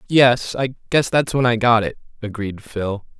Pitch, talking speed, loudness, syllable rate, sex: 115 Hz, 190 wpm, -19 LUFS, 4.2 syllables/s, male